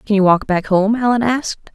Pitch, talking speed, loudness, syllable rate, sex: 210 Hz, 240 wpm, -15 LUFS, 5.5 syllables/s, female